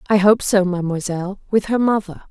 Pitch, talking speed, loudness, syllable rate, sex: 195 Hz, 180 wpm, -18 LUFS, 6.2 syllables/s, female